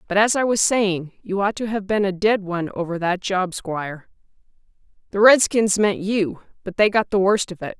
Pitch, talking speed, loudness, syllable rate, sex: 195 Hz, 215 wpm, -20 LUFS, 5.1 syllables/s, female